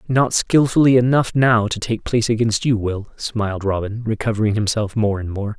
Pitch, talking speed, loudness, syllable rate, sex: 110 Hz, 185 wpm, -18 LUFS, 5.2 syllables/s, male